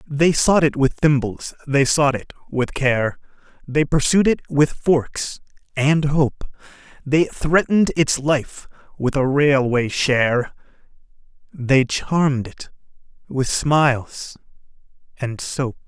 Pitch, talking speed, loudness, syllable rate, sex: 140 Hz, 120 wpm, -19 LUFS, 3.5 syllables/s, male